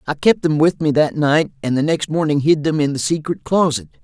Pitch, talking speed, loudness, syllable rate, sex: 150 Hz, 255 wpm, -17 LUFS, 5.4 syllables/s, male